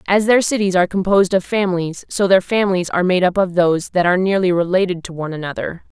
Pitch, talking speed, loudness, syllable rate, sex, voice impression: 185 Hz, 220 wpm, -17 LUFS, 6.9 syllables/s, female, feminine, adult-like, slightly powerful, slightly hard, clear, fluent, intellectual, calm, unique, slightly lively, sharp, slightly light